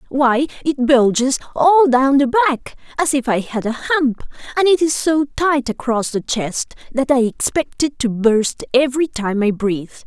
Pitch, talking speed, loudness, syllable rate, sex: 265 Hz, 185 wpm, -17 LUFS, 4.4 syllables/s, female